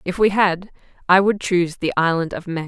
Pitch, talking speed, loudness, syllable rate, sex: 180 Hz, 225 wpm, -19 LUFS, 5.4 syllables/s, female